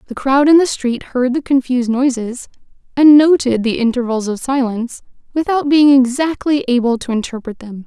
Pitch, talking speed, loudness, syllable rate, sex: 260 Hz, 170 wpm, -14 LUFS, 5.2 syllables/s, female